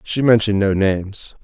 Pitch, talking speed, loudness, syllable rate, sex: 105 Hz, 165 wpm, -17 LUFS, 5.5 syllables/s, male